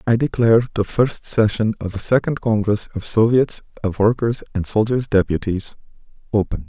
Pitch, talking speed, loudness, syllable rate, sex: 110 Hz, 155 wpm, -19 LUFS, 5.2 syllables/s, male